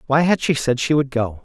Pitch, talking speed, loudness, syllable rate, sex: 135 Hz, 290 wpm, -19 LUFS, 5.5 syllables/s, male